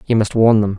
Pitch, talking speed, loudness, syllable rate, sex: 105 Hz, 305 wpm, -14 LUFS, 5.8 syllables/s, male